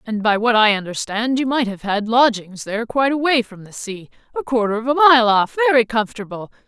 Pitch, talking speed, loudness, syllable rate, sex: 230 Hz, 200 wpm, -17 LUFS, 5.8 syllables/s, female